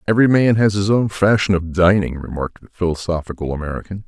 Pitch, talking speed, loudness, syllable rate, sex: 95 Hz, 175 wpm, -18 LUFS, 6.4 syllables/s, male